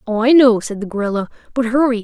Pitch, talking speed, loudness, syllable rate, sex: 230 Hz, 205 wpm, -16 LUFS, 6.1 syllables/s, female